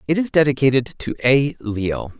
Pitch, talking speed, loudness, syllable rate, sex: 130 Hz, 165 wpm, -19 LUFS, 4.6 syllables/s, male